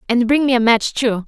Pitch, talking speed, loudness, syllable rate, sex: 240 Hz, 285 wpm, -15 LUFS, 5.5 syllables/s, female